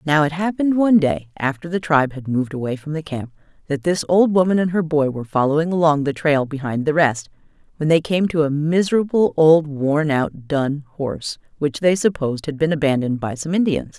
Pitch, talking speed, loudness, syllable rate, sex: 155 Hz, 205 wpm, -19 LUFS, 5.7 syllables/s, female